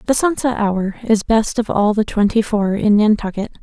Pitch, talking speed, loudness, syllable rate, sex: 215 Hz, 200 wpm, -17 LUFS, 4.9 syllables/s, female